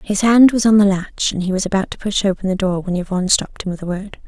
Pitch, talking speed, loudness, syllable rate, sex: 195 Hz, 310 wpm, -17 LUFS, 6.4 syllables/s, female